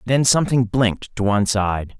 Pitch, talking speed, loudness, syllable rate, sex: 110 Hz, 180 wpm, -19 LUFS, 5.4 syllables/s, male